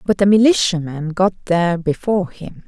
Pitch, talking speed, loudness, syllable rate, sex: 185 Hz, 155 wpm, -17 LUFS, 5.4 syllables/s, female